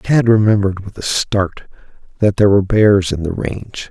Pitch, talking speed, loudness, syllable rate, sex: 100 Hz, 185 wpm, -15 LUFS, 5.7 syllables/s, male